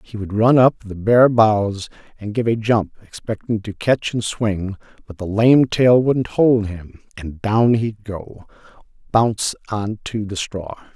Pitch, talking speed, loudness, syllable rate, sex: 110 Hz, 175 wpm, -18 LUFS, 3.9 syllables/s, male